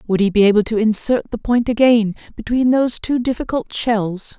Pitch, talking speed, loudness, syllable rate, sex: 225 Hz, 190 wpm, -17 LUFS, 5.3 syllables/s, female